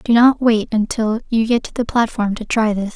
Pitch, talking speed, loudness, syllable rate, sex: 225 Hz, 245 wpm, -17 LUFS, 5.1 syllables/s, female